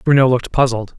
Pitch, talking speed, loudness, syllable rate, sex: 125 Hz, 180 wpm, -15 LUFS, 6.7 syllables/s, male